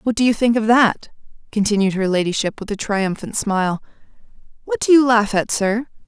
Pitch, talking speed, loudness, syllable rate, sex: 215 Hz, 190 wpm, -18 LUFS, 5.5 syllables/s, female